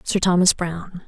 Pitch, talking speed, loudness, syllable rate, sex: 180 Hz, 170 wpm, -19 LUFS, 5.2 syllables/s, female